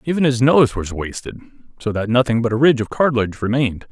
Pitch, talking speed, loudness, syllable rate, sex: 120 Hz, 215 wpm, -18 LUFS, 6.8 syllables/s, male